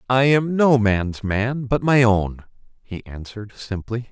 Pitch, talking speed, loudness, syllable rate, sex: 115 Hz, 160 wpm, -19 LUFS, 4.0 syllables/s, male